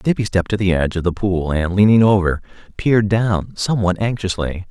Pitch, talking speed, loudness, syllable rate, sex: 95 Hz, 190 wpm, -17 LUFS, 5.8 syllables/s, male